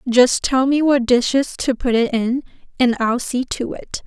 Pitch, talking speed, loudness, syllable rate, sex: 250 Hz, 205 wpm, -18 LUFS, 4.5 syllables/s, female